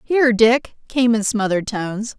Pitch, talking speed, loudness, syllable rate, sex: 225 Hz, 165 wpm, -18 LUFS, 5.0 syllables/s, female